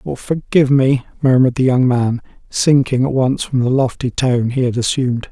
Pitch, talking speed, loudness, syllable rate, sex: 130 Hz, 190 wpm, -16 LUFS, 5.3 syllables/s, male